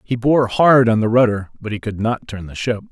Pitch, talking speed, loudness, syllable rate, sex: 115 Hz, 265 wpm, -17 LUFS, 5.3 syllables/s, male